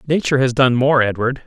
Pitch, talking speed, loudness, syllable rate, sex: 130 Hz, 205 wpm, -16 LUFS, 6.1 syllables/s, male